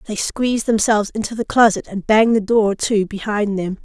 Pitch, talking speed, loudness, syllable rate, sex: 215 Hz, 205 wpm, -17 LUFS, 5.5 syllables/s, female